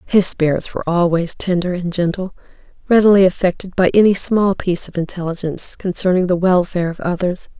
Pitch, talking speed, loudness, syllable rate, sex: 180 Hz, 160 wpm, -16 LUFS, 5.9 syllables/s, female